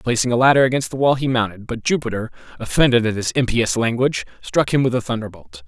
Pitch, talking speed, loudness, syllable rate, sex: 120 Hz, 210 wpm, -19 LUFS, 6.5 syllables/s, male